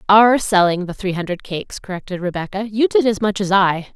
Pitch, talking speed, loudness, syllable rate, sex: 200 Hz, 210 wpm, -18 LUFS, 5.7 syllables/s, female